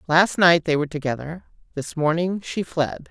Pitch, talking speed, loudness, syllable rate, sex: 160 Hz, 175 wpm, -21 LUFS, 4.9 syllables/s, female